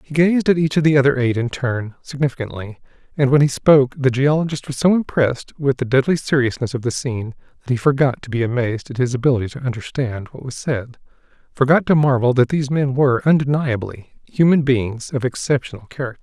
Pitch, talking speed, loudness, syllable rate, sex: 135 Hz, 200 wpm, -18 LUFS, 6.0 syllables/s, male